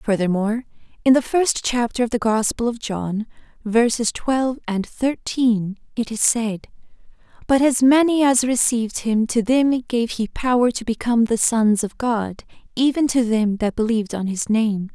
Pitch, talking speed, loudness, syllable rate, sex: 230 Hz, 170 wpm, -20 LUFS, 4.6 syllables/s, female